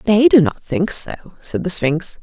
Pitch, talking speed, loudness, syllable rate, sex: 205 Hz, 215 wpm, -16 LUFS, 3.8 syllables/s, female